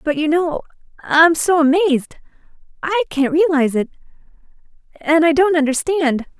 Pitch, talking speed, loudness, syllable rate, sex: 310 Hz, 105 wpm, -16 LUFS, 5.1 syllables/s, female